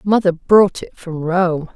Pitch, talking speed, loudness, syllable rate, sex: 180 Hz, 170 wpm, -16 LUFS, 3.7 syllables/s, female